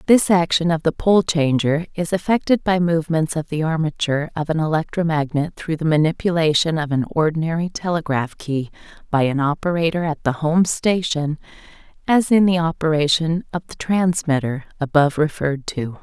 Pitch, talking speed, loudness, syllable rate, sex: 160 Hz, 155 wpm, -19 LUFS, 5.3 syllables/s, female